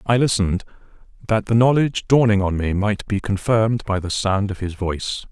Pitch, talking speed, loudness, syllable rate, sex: 105 Hz, 190 wpm, -20 LUFS, 5.6 syllables/s, male